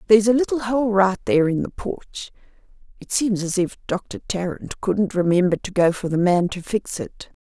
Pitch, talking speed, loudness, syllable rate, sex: 195 Hz, 200 wpm, -21 LUFS, 4.9 syllables/s, female